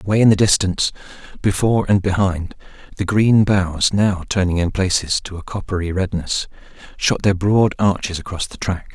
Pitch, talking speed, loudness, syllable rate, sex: 95 Hz, 170 wpm, -18 LUFS, 5.2 syllables/s, male